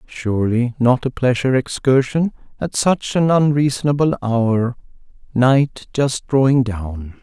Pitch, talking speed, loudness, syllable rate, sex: 130 Hz, 110 wpm, -18 LUFS, 4.1 syllables/s, male